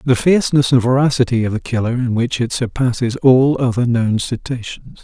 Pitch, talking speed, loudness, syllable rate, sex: 125 Hz, 180 wpm, -16 LUFS, 5.3 syllables/s, male